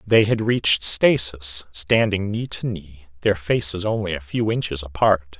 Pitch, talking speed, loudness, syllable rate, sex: 95 Hz, 165 wpm, -20 LUFS, 4.3 syllables/s, male